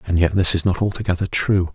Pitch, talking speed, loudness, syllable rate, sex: 90 Hz, 240 wpm, -19 LUFS, 6.3 syllables/s, male